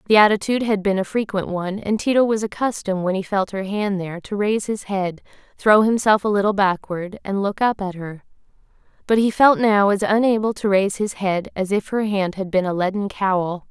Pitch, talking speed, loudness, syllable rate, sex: 200 Hz, 220 wpm, -20 LUFS, 5.6 syllables/s, female